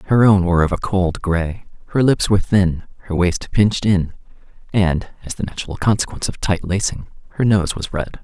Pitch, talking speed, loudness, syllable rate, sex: 95 Hz, 180 wpm, -18 LUFS, 5.6 syllables/s, male